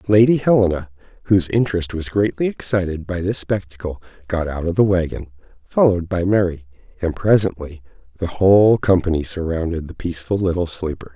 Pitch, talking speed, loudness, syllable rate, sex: 90 Hz, 150 wpm, -19 LUFS, 5.8 syllables/s, male